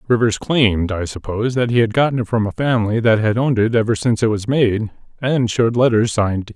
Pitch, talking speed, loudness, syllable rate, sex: 115 Hz, 240 wpm, -17 LUFS, 6.2 syllables/s, male